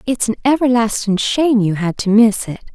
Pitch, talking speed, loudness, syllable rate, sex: 225 Hz, 195 wpm, -15 LUFS, 5.2 syllables/s, female